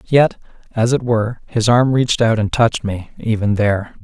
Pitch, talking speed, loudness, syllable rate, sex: 115 Hz, 195 wpm, -17 LUFS, 5.3 syllables/s, male